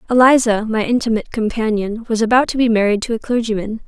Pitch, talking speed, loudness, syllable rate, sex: 225 Hz, 185 wpm, -16 LUFS, 6.4 syllables/s, female